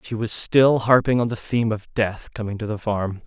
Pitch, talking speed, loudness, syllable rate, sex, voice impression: 110 Hz, 240 wpm, -21 LUFS, 5.3 syllables/s, male, masculine, adult-like, fluent, slightly cool, refreshing, sincere